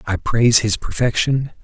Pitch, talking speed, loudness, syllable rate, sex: 115 Hz, 145 wpm, -17 LUFS, 4.9 syllables/s, male